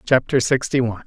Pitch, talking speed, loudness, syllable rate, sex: 125 Hz, 170 wpm, -19 LUFS, 6.3 syllables/s, male